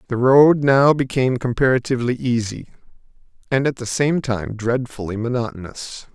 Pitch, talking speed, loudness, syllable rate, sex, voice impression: 125 Hz, 125 wpm, -19 LUFS, 5.1 syllables/s, male, very masculine, middle-aged, slightly thick, muffled, slightly cool, calm, slightly friendly, slightly kind